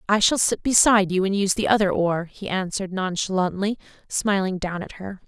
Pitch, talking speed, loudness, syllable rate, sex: 195 Hz, 195 wpm, -22 LUFS, 5.7 syllables/s, female